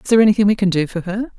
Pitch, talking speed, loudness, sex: 200 Hz, 345 wpm, -16 LUFS, female